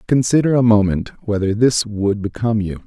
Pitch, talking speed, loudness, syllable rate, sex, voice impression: 110 Hz, 165 wpm, -17 LUFS, 5.2 syllables/s, male, very masculine, very middle-aged, very thick, slightly relaxed, powerful, slightly bright, slightly soft, muffled, fluent, slightly raspy, very cool, intellectual, slightly refreshing, sincere, calm, very mature, friendly, reassuring, very unique, slightly elegant, wild, sweet, lively, very kind, modest